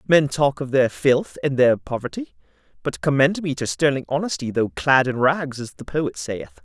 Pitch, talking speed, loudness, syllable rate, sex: 140 Hz, 200 wpm, -21 LUFS, 4.7 syllables/s, male